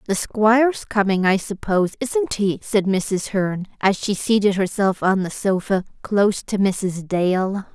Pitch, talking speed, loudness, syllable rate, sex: 200 Hz, 165 wpm, -20 LUFS, 4.2 syllables/s, female